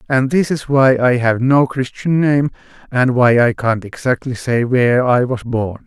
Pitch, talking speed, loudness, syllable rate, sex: 125 Hz, 195 wpm, -15 LUFS, 4.3 syllables/s, male